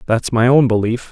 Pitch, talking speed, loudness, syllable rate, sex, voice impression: 120 Hz, 215 wpm, -14 LUFS, 5.3 syllables/s, male, masculine, adult-like, relaxed, weak, dark, soft, cool, calm, reassuring, slightly wild, kind, modest